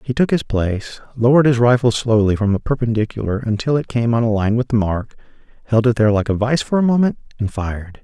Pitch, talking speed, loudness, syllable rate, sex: 115 Hz, 230 wpm, -17 LUFS, 6.3 syllables/s, male